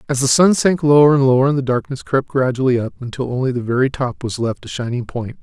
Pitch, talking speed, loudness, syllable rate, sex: 130 Hz, 245 wpm, -17 LUFS, 6.0 syllables/s, male